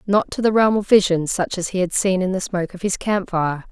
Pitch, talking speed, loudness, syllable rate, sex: 190 Hz, 290 wpm, -19 LUFS, 5.7 syllables/s, female